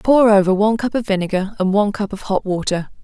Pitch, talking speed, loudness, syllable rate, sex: 205 Hz, 235 wpm, -17 LUFS, 6.4 syllables/s, female